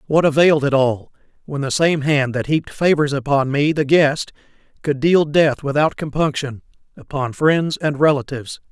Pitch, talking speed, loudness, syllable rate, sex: 145 Hz, 165 wpm, -18 LUFS, 4.9 syllables/s, male